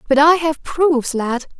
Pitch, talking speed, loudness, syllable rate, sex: 290 Hz, 190 wpm, -16 LUFS, 3.9 syllables/s, female